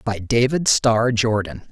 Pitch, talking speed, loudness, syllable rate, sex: 115 Hz, 140 wpm, -18 LUFS, 3.7 syllables/s, male